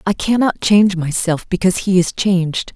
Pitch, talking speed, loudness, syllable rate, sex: 185 Hz, 175 wpm, -16 LUFS, 5.3 syllables/s, female